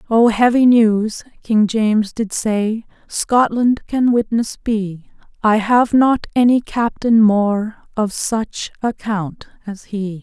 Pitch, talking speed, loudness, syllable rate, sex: 220 Hz, 130 wpm, -17 LUFS, 3.7 syllables/s, female